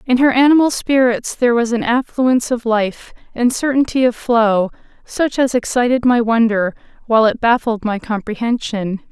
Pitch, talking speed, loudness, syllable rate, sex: 235 Hz, 160 wpm, -16 LUFS, 4.9 syllables/s, female